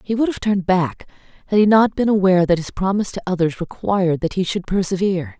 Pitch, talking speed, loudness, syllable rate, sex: 190 Hz, 225 wpm, -18 LUFS, 6.5 syllables/s, female